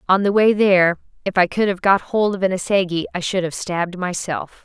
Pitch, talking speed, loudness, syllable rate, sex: 185 Hz, 235 wpm, -19 LUFS, 5.7 syllables/s, female